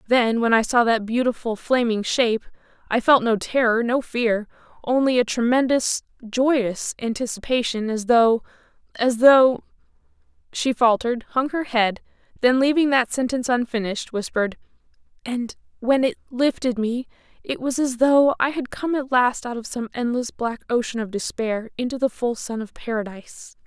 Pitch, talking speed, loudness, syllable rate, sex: 240 Hz, 140 wpm, -21 LUFS, 4.9 syllables/s, female